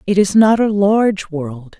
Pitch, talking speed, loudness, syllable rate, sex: 190 Hz, 200 wpm, -14 LUFS, 4.2 syllables/s, female